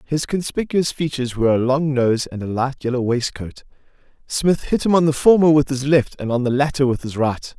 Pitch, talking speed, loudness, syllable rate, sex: 135 Hz, 230 wpm, -19 LUFS, 5.6 syllables/s, male